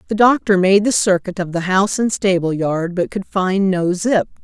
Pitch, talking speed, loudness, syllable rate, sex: 190 Hz, 215 wpm, -17 LUFS, 4.9 syllables/s, female